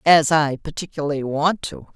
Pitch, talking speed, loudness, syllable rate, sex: 155 Hz, 155 wpm, -20 LUFS, 5.0 syllables/s, female